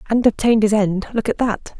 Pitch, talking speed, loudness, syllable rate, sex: 215 Hz, 235 wpm, -18 LUFS, 6.0 syllables/s, female